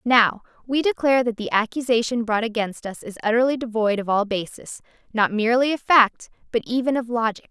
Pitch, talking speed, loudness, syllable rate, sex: 235 Hz, 185 wpm, -21 LUFS, 5.6 syllables/s, female